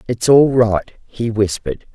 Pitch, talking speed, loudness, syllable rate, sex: 110 Hz, 155 wpm, -15 LUFS, 4.6 syllables/s, female